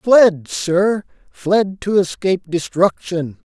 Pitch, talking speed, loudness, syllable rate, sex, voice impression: 185 Hz, 100 wpm, -17 LUFS, 3.2 syllables/s, male, very masculine, slightly old, very thick, slightly tensed, slightly weak, slightly bright, hard, muffled, slightly halting, raspy, cool, slightly intellectual, slightly refreshing, sincere, calm, very mature, slightly friendly, slightly reassuring, unique, very wild, sweet, lively, strict, intense